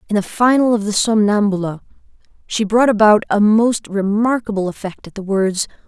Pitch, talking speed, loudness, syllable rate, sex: 210 Hz, 165 wpm, -16 LUFS, 5.2 syllables/s, female